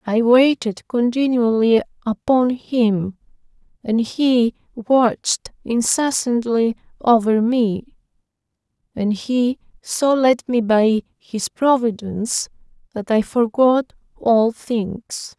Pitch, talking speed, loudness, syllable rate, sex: 235 Hz, 95 wpm, -18 LUFS, 3.2 syllables/s, female